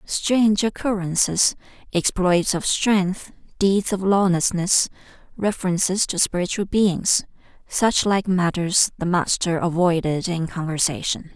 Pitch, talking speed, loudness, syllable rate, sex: 185 Hz, 100 wpm, -21 LUFS, 4.1 syllables/s, female